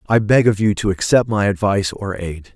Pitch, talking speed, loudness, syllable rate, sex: 100 Hz, 235 wpm, -17 LUFS, 5.4 syllables/s, male